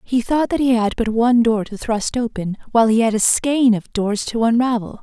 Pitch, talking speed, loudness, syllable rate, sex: 230 Hz, 240 wpm, -18 LUFS, 5.2 syllables/s, female